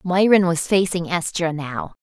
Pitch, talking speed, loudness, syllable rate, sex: 175 Hz, 150 wpm, -20 LUFS, 4.3 syllables/s, female